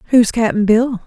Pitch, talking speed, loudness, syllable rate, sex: 225 Hz, 170 wpm, -14 LUFS, 3.9 syllables/s, female